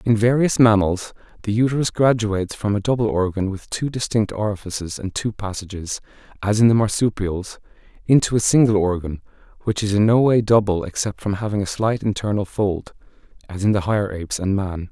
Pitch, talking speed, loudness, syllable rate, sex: 105 Hz, 180 wpm, -20 LUFS, 5.5 syllables/s, male